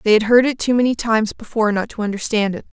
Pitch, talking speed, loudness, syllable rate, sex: 220 Hz, 260 wpm, -18 LUFS, 7.0 syllables/s, female